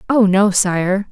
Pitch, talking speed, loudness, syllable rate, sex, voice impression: 200 Hz, 160 wpm, -15 LUFS, 3.3 syllables/s, female, feminine, middle-aged, tensed, powerful, slightly hard, clear, fluent, intellectual, calm, reassuring, elegant, lively, slightly modest